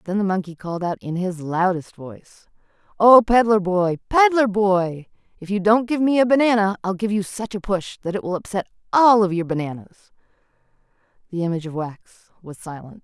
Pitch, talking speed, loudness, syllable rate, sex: 195 Hz, 190 wpm, -20 LUFS, 5.4 syllables/s, female